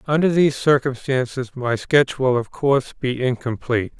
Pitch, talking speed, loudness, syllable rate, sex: 130 Hz, 150 wpm, -20 LUFS, 5.1 syllables/s, male